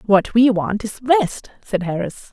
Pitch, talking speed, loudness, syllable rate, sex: 215 Hz, 180 wpm, -18 LUFS, 4.1 syllables/s, female